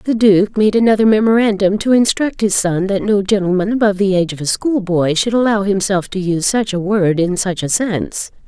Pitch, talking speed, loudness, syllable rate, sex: 200 Hz, 210 wpm, -15 LUFS, 5.5 syllables/s, female